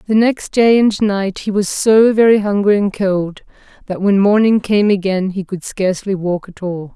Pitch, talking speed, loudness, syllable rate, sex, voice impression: 200 Hz, 200 wpm, -15 LUFS, 4.6 syllables/s, female, feminine, adult-like, slightly weak, slightly dark, clear, calm, slightly friendly, slightly reassuring, unique, modest